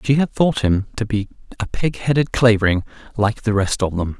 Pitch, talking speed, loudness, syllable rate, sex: 110 Hz, 200 wpm, -19 LUFS, 5.3 syllables/s, male